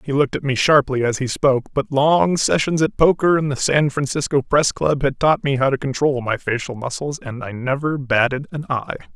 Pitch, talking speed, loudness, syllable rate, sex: 140 Hz, 225 wpm, -19 LUFS, 5.3 syllables/s, male